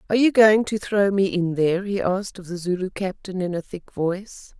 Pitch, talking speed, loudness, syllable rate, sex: 190 Hz, 235 wpm, -22 LUFS, 5.5 syllables/s, female